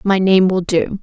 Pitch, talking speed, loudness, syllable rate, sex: 185 Hz, 235 wpm, -14 LUFS, 4.3 syllables/s, female